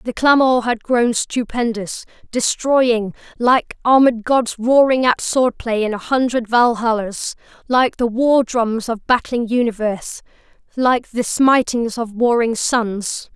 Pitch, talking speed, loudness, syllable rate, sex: 240 Hz, 130 wpm, -17 LUFS, 3.9 syllables/s, female